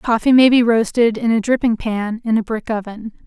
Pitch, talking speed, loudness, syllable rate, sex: 225 Hz, 220 wpm, -16 LUFS, 5.2 syllables/s, female